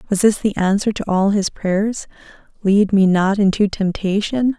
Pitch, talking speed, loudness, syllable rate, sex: 200 Hz, 170 wpm, -17 LUFS, 4.5 syllables/s, female